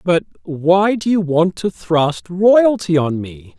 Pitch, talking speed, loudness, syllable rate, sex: 170 Hz, 165 wpm, -16 LUFS, 3.3 syllables/s, male